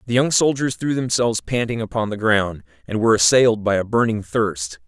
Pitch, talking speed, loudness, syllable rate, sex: 115 Hz, 195 wpm, -19 LUFS, 5.6 syllables/s, male